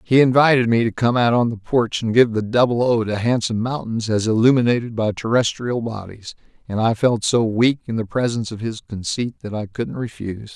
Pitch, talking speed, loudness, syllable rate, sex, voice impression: 115 Hz, 210 wpm, -19 LUFS, 5.5 syllables/s, male, masculine, adult-like, slightly thick, cool, slightly intellectual, slightly unique